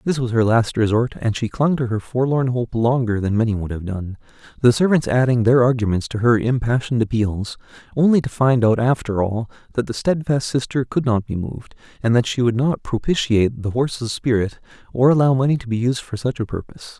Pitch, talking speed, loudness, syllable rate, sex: 120 Hz, 210 wpm, -19 LUFS, 5.7 syllables/s, male